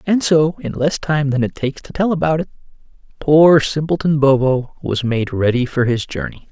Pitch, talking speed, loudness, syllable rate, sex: 145 Hz, 195 wpm, -17 LUFS, 5.0 syllables/s, male